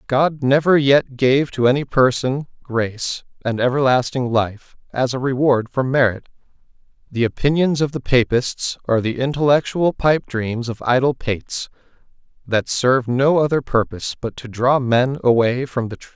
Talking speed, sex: 165 wpm, male